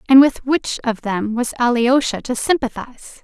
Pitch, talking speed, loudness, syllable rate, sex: 250 Hz, 165 wpm, -18 LUFS, 4.7 syllables/s, female